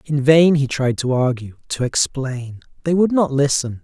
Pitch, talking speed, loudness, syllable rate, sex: 140 Hz, 190 wpm, -18 LUFS, 4.5 syllables/s, male